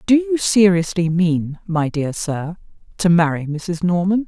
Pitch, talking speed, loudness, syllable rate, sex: 180 Hz, 155 wpm, -18 LUFS, 4.1 syllables/s, female